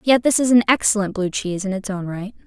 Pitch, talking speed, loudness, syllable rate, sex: 210 Hz, 270 wpm, -19 LUFS, 6.3 syllables/s, female